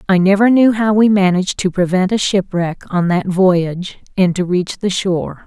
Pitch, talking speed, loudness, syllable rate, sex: 190 Hz, 200 wpm, -15 LUFS, 4.9 syllables/s, female